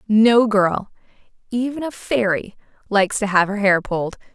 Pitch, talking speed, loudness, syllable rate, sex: 210 Hz, 150 wpm, -19 LUFS, 4.8 syllables/s, female